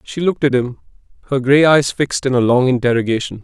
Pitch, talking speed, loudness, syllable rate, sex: 130 Hz, 210 wpm, -15 LUFS, 6.4 syllables/s, male